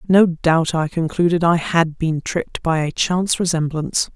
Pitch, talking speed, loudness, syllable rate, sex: 165 Hz, 175 wpm, -18 LUFS, 4.8 syllables/s, female